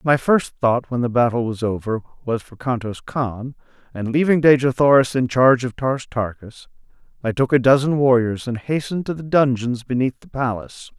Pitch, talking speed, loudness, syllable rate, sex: 125 Hz, 185 wpm, -19 LUFS, 5.2 syllables/s, male